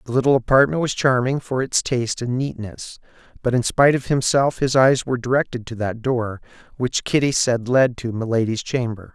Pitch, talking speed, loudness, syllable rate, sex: 125 Hz, 190 wpm, -20 LUFS, 5.4 syllables/s, male